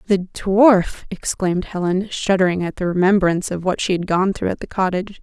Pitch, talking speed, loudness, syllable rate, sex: 190 Hz, 195 wpm, -19 LUFS, 5.7 syllables/s, female